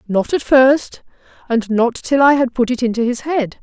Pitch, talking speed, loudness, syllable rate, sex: 250 Hz, 215 wpm, -15 LUFS, 4.7 syllables/s, female